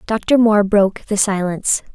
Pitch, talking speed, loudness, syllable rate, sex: 205 Hz, 155 wpm, -16 LUFS, 5.4 syllables/s, female